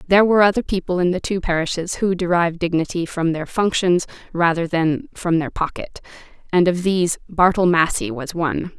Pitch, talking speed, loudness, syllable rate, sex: 175 Hz, 180 wpm, -19 LUFS, 5.5 syllables/s, female